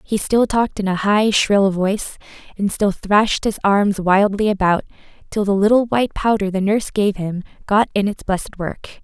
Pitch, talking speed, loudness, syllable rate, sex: 200 Hz, 195 wpm, -18 LUFS, 5.1 syllables/s, female